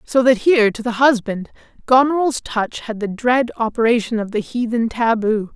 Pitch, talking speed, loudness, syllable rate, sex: 235 Hz, 175 wpm, -18 LUFS, 5.0 syllables/s, male